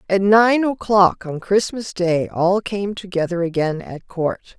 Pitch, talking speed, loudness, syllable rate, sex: 190 Hz, 155 wpm, -19 LUFS, 3.9 syllables/s, female